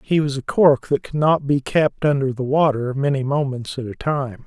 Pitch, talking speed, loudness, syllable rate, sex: 140 Hz, 230 wpm, -20 LUFS, 4.9 syllables/s, male